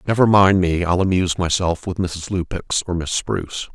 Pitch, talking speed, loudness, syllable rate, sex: 90 Hz, 190 wpm, -19 LUFS, 5.2 syllables/s, male